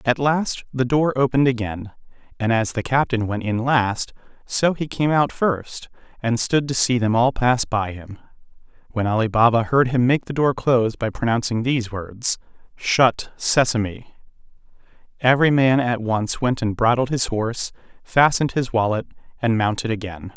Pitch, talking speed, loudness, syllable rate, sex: 120 Hz, 170 wpm, -20 LUFS, 4.8 syllables/s, male